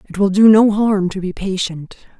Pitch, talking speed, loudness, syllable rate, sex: 195 Hz, 220 wpm, -15 LUFS, 5.0 syllables/s, female